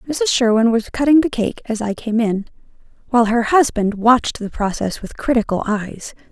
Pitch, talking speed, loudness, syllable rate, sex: 230 Hz, 180 wpm, -17 LUFS, 5.2 syllables/s, female